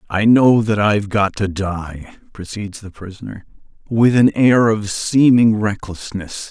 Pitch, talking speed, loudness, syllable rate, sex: 105 Hz, 150 wpm, -16 LUFS, 4.1 syllables/s, male